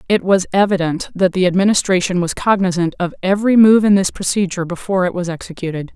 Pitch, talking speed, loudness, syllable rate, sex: 185 Hz, 180 wpm, -16 LUFS, 6.5 syllables/s, female